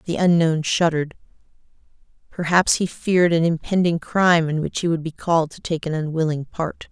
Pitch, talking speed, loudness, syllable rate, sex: 165 Hz, 175 wpm, -20 LUFS, 5.5 syllables/s, female